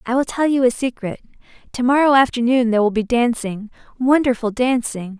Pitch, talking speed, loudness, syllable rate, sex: 245 Hz, 150 wpm, -18 LUFS, 5.6 syllables/s, female